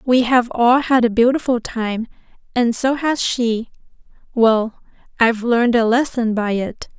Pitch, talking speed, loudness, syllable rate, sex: 235 Hz, 145 wpm, -17 LUFS, 4.3 syllables/s, female